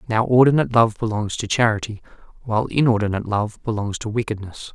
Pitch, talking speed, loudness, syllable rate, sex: 110 Hz, 150 wpm, -20 LUFS, 6.4 syllables/s, male